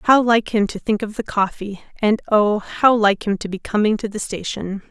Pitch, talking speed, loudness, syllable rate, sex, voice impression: 210 Hz, 230 wpm, -19 LUFS, 4.8 syllables/s, female, feminine, adult-like, slightly sincere, slightly calm, slightly sweet